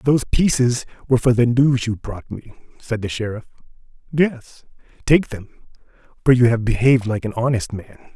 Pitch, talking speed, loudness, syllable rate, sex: 120 Hz, 170 wpm, -19 LUFS, 5.3 syllables/s, male